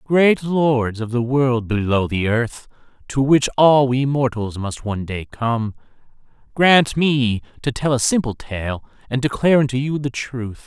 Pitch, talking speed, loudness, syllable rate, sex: 125 Hz, 170 wpm, -19 LUFS, 4.2 syllables/s, male